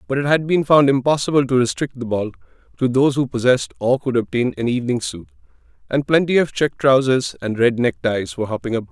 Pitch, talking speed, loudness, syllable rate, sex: 130 Hz, 210 wpm, -18 LUFS, 6.2 syllables/s, male